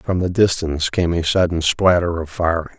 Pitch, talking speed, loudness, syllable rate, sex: 85 Hz, 195 wpm, -18 LUFS, 5.3 syllables/s, male